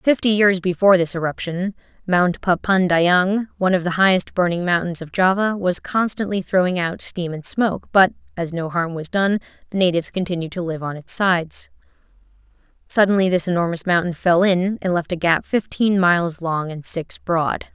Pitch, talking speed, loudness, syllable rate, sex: 180 Hz, 175 wpm, -19 LUFS, 5.2 syllables/s, female